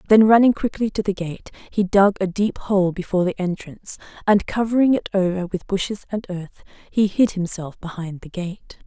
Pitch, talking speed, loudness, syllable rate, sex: 195 Hz, 190 wpm, -21 LUFS, 5.1 syllables/s, female